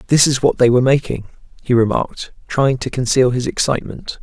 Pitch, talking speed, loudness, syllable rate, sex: 130 Hz, 185 wpm, -16 LUFS, 6.0 syllables/s, male